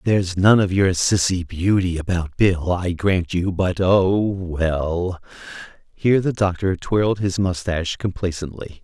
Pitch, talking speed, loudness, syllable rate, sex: 90 Hz, 130 wpm, -20 LUFS, 4.2 syllables/s, male